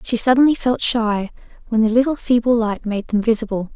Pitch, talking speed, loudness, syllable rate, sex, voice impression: 230 Hz, 190 wpm, -18 LUFS, 5.5 syllables/s, female, slightly feminine, young, slightly soft, slightly cute, friendly, slightly kind